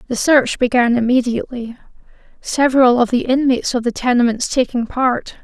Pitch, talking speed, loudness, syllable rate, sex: 245 Hz, 145 wpm, -16 LUFS, 5.5 syllables/s, female